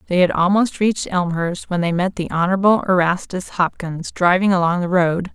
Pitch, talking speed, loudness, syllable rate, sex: 180 Hz, 180 wpm, -18 LUFS, 5.3 syllables/s, female